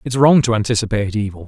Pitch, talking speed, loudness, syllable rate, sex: 110 Hz, 205 wpm, -16 LUFS, 7.3 syllables/s, male